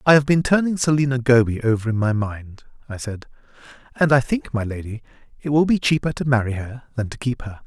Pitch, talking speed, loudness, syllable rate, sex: 125 Hz, 220 wpm, -20 LUFS, 5.8 syllables/s, male